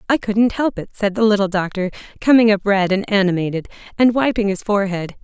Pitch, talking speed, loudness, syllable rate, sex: 205 Hz, 195 wpm, -18 LUFS, 5.9 syllables/s, female